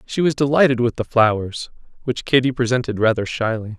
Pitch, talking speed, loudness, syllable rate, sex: 120 Hz, 175 wpm, -19 LUFS, 5.7 syllables/s, male